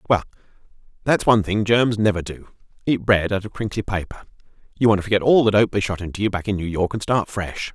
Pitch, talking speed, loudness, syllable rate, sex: 100 Hz, 240 wpm, -20 LUFS, 6.4 syllables/s, male